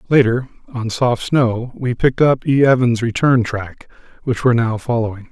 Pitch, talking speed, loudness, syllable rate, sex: 120 Hz, 180 wpm, -17 LUFS, 5.2 syllables/s, male